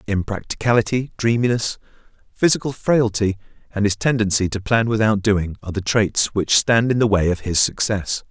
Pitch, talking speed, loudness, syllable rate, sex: 110 Hz, 160 wpm, -19 LUFS, 5.2 syllables/s, male